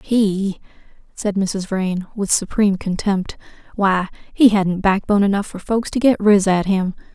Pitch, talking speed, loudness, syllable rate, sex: 200 Hz, 160 wpm, -18 LUFS, 4.5 syllables/s, female